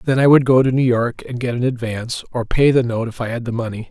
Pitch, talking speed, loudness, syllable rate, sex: 120 Hz, 305 wpm, -18 LUFS, 6.3 syllables/s, male